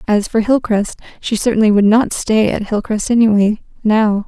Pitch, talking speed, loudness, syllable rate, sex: 215 Hz, 140 wpm, -14 LUFS, 4.9 syllables/s, female